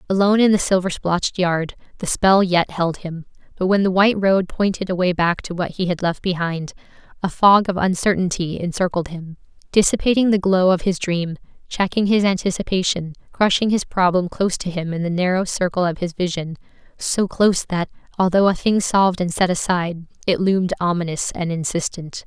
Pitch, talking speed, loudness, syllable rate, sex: 180 Hz, 185 wpm, -19 LUFS, 5.4 syllables/s, female